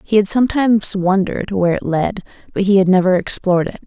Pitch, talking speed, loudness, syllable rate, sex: 195 Hz, 200 wpm, -16 LUFS, 6.4 syllables/s, female